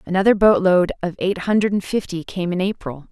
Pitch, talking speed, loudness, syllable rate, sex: 185 Hz, 210 wpm, -19 LUFS, 5.6 syllables/s, female